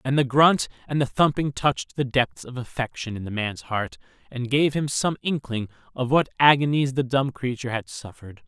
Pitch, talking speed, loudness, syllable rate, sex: 125 Hz, 200 wpm, -23 LUFS, 5.2 syllables/s, male